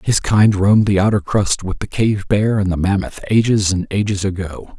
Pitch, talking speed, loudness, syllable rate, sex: 100 Hz, 215 wpm, -16 LUFS, 5.0 syllables/s, male